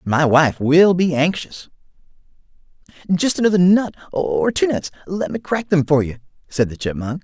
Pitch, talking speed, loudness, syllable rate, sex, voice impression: 165 Hz, 160 wpm, -18 LUFS, 4.7 syllables/s, male, very masculine, very adult-like, slightly thick, slightly tensed, powerful, slightly bright, soft, clear, fluent, slightly raspy, cool, intellectual, very refreshing, sincere, calm, slightly mature, friendly, reassuring, unique, slightly elegant, wild, slightly sweet, lively, kind, slightly intense